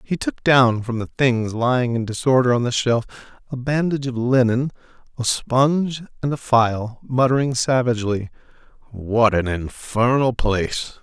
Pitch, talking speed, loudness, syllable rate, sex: 120 Hz, 145 wpm, -20 LUFS, 4.7 syllables/s, male